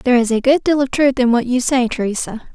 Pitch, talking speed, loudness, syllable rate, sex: 250 Hz, 285 wpm, -16 LUFS, 6.1 syllables/s, female